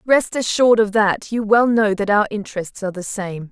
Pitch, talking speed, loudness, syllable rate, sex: 210 Hz, 220 wpm, -18 LUFS, 5.3 syllables/s, female